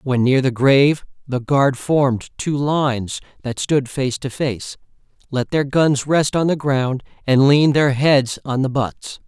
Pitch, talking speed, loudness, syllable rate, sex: 135 Hz, 180 wpm, -18 LUFS, 4.1 syllables/s, male